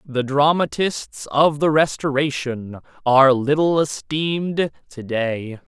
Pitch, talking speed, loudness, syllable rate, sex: 140 Hz, 105 wpm, -19 LUFS, 3.7 syllables/s, male